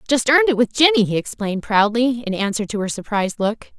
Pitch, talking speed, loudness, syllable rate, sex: 230 Hz, 220 wpm, -18 LUFS, 6.2 syllables/s, female